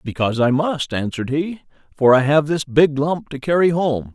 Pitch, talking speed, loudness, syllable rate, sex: 145 Hz, 205 wpm, -18 LUFS, 5.2 syllables/s, male